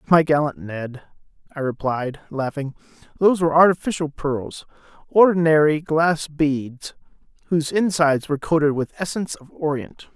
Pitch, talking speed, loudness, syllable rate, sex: 150 Hz, 125 wpm, -20 LUFS, 5.1 syllables/s, male